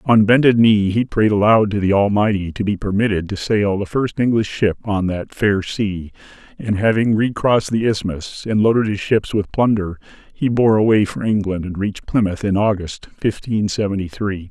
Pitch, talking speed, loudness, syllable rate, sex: 105 Hz, 190 wpm, -18 LUFS, 5.1 syllables/s, male